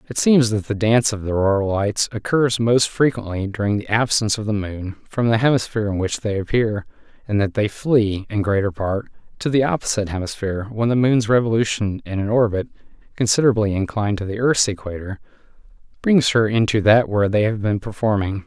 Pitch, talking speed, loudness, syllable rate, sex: 110 Hz, 190 wpm, -19 LUFS, 5.8 syllables/s, male